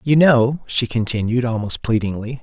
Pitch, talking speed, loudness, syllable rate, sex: 120 Hz, 150 wpm, -18 LUFS, 4.8 syllables/s, male